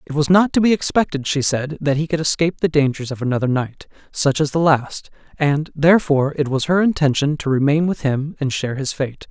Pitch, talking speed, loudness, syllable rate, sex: 150 Hz, 225 wpm, -18 LUFS, 5.7 syllables/s, male